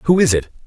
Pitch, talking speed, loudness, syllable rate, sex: 140 Hz, 270 wpm, -16 LUFS, 6.0 syllables/s, male